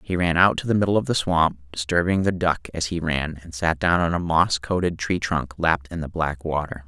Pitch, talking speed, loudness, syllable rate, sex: 85 Hz, 255 wpm, -22 LUFS, 5.4 syllables/s, male